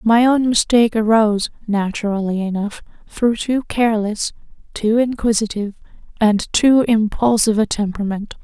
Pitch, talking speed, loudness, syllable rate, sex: 220 Hz, 115 wpm, -17 LUFS, 5.1 syllables/s, female